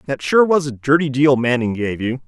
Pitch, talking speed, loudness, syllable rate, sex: 130 Hz, 235 wpm, -17 LUFS, 5.2 syllables/s, male